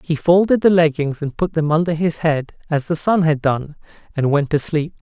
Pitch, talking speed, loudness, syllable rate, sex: 160 Hz, 225 wpm, -18 LUFS, 5.0 syllables/s, male